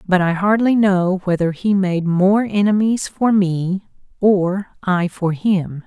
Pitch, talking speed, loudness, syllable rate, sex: 190 Hz, 155 wpm, -17 LUFS, 3.6 syllables/s, female